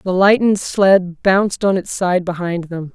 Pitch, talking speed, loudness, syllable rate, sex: 185 Hz, 185 wpm, -16 LUFS, 4.5 syllables/s, female